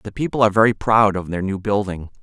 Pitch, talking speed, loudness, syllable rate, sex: 100 Hz, 245 wpm, -18 LUFS, 6.2 syllables/s, male